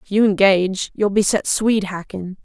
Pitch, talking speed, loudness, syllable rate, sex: 195 Hz, 195 wpm, -18 LUFS, 5.3 syllables/s, female